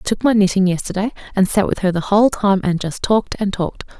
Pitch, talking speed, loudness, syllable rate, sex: 195 Hz, 255 wpm, -17 LUFS, 6.5 syllables/s, female